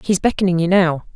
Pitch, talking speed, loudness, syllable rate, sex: 180 Hz, 205 wpm, -17 LUFS, 6.0 syllables/s, female